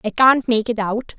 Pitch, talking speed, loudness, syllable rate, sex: 225 Hz, 255 wpm, -17 LUFS, 4.7 syllables/s, female